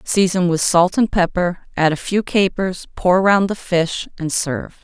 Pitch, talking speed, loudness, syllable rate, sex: 180 Hz, 185 wpm, -18 LUFS, 4.5 syllables/s, female